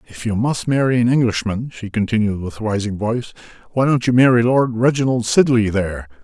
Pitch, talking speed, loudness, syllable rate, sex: 115 Hz, 185 wpm, -18 LUFS, 5.7 syllables/s, male